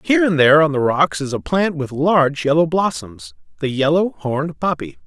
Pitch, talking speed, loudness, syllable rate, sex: 155 Hz, 190 wpm, -17 LUFS, 5.4 syllables/s, male